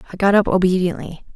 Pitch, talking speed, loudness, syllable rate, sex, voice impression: 190 Hz, 175 wpm, -17 LUFS, 7.1 syllables/s, female, feminine, young, tensed, powerful, bright, soft, slightly raspy, calm, friendly, elegant, lively